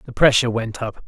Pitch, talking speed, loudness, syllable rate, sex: 115 Hz, 225 wpm, -19 LUFS, 6.5 syllables/s, male